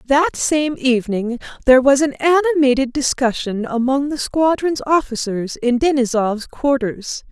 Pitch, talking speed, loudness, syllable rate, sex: 265 Hz, 125 wpm, -17 LUFS, 4.3 syllables/s, female